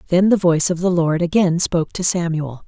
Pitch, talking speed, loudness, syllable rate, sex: 170 Hz, 225 wpm, -18 LUFS, 5.7 syllables/s, female